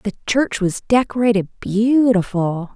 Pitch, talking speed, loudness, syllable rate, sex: 215 Hz, 110 wpm, -18 LUFS, 4.3 syllables/s, female